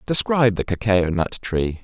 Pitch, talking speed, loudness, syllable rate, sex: 105 Hz, 165 wpm, -20 LUFS, 4.8 syllables/s, male